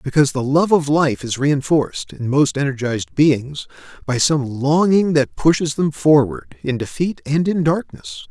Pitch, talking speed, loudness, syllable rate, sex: 140 Hz, 165 wpm, -18 LUFS, 4.5 syllables/s, male